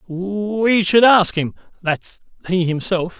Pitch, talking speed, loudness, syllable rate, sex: 185 Hz, 130 wpm, -17 LUFS, 3.2 syllables/s, male